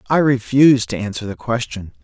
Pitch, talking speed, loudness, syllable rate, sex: 115 Hz, 175 wpm, -17 LUFS, 5.7 syllables/s, male